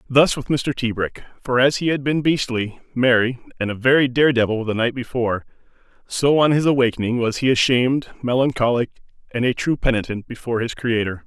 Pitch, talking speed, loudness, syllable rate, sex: 125 Hz, 180 wpm, -20 LUFS, 5.7 syllables/s, male